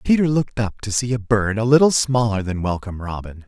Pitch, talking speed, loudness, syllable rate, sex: 110 Hz, 225 wpm, -19 LUFS, 5.9 syllables/s, male